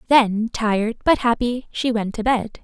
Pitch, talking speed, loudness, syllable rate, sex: 230 Hz, 180 wpm, -20 LUFS, 4.3 syllables/s, female